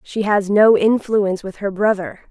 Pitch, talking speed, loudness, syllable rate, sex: 205 Hz, 180 wpm, -17 LUFS, 4.6 syllables/s, female